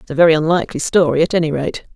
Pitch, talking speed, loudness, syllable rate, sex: 160 Hz, 245 wpm, -16 LUFS, 7.5 syllables/s, female